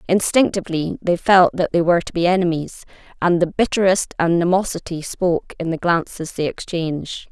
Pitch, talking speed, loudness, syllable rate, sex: 175 Hz, 155 wpm, -19 LUFS, 5.4 syllables/s, female